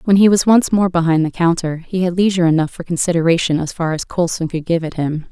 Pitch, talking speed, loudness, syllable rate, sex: 170 Hz, 250 wpm, -16 LUFS, 6.2 syllables/s, female